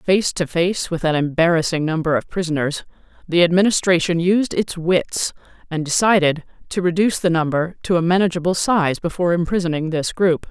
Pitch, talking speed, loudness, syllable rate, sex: 170 Hz, 160 wpm, -19 LUFS, 5.4 syllables/s, female